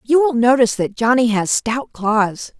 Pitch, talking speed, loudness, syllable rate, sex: 235 Hz, 185 wpm, -17 LUFS, 4.5 syllables/s, female